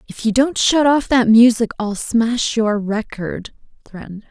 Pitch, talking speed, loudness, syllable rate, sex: 230 Hz, 180 wpm, -16 LUFS, 4.8 syllables/s, female